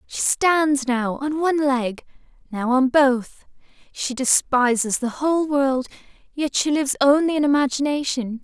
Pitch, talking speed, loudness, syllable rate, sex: 270 Hz, 140 wpm, -20 LUFS, 4.4 syllables/s, female